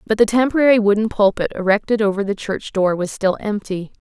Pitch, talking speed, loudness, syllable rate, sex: 210 Hz, 195 wpm, -18 LUFS, 5.8 syllables/s, female